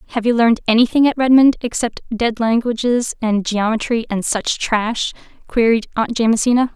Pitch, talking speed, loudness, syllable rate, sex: 230 Hz, 150 wpm, -17 LUFS, 5.3 syllables/s, female